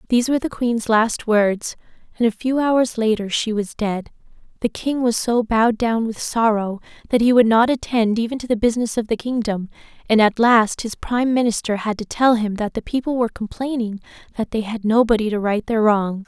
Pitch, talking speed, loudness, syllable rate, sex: 225 Hz, 210 wpm, -19 LUFS, 5.4 syllables/s, female